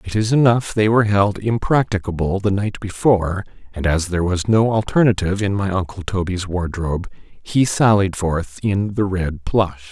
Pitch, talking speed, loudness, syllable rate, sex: 100 Hz, 170 wpm, -19 LUFS, 5.0 syllables/s, male